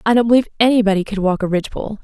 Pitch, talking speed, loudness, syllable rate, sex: 210 Hz, 235 wpm, -16 LUFS, 8.9 syllables/s, female